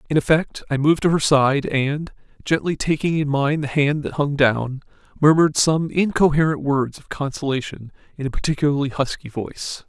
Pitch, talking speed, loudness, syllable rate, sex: 145 Hz, 170 wpm, -20 LUFS, 5.3 syllables/s, male